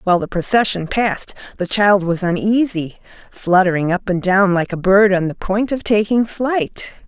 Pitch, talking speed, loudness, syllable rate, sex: 195 Hz, 180 wpm, -17 LUFS, 4.8 syllables/s, female